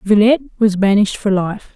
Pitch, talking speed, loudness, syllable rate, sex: 210 Hz, 170 wpm, -15 LUFS, 6.2 syllables/s, female